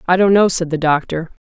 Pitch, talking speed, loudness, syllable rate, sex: 170 Hz, 245 wpm, -16 LUFS, 5.9 syllables/s, female